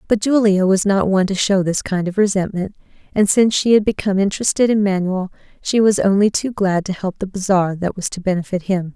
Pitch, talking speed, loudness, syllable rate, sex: 195 Hz, 220 wpm, -17 LUFS, 5.9 syllables/s, female